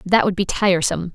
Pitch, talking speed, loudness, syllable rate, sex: 185 Hz, 210 wpm, -19 LUFS, 6.7 syllables/s, female